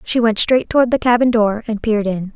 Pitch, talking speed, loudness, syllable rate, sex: 225 Hz, 255 wpm, -16 LUFS, 5.9 syllables/s, female